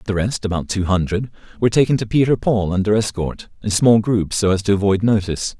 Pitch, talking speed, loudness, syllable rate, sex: 105 Hz, 215 wpm, -18 LUFS, 6.0 syllables/s, male